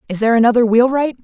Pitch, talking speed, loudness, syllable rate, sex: 240 Hz, 195 wpm, -13 LUFS, 7.8 syllables/s, female